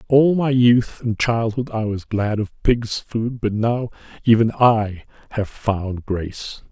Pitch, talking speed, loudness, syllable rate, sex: 115 Hz, 160 wpm, -20 LUFS, 3.7 syllables/s, male